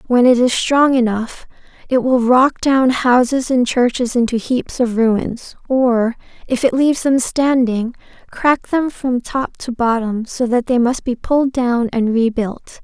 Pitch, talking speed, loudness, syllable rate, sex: 245 Hz, 175 wpm, -16 LUFS, 4.0 syllables/s, female